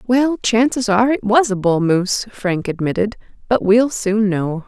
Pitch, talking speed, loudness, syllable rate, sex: 215 Hz, 180 wpm, -17 LUFS, 4.6 syllables/s, female